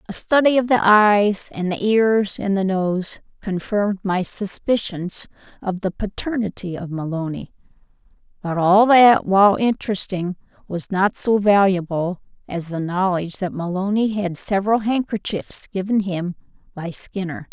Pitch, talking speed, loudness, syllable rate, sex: 195 Hz, 135 wpm, -20 LUFS, 4.5 syllables/s, female